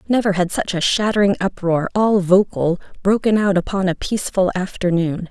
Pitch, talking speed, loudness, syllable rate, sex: 190 Hz, 160 wpm, -18 LUFS, 5.2 syllables/s, female